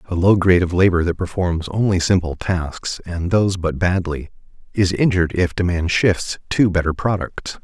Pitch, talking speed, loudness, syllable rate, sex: 90 Hz, 175 wpm, -19 LUFS, 4.9 syllables/s, male